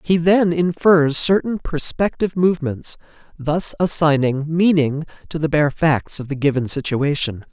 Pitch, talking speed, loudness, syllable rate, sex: 155 Hz, 135 wpm, -18 LUFS, 4.5 syllables/s, male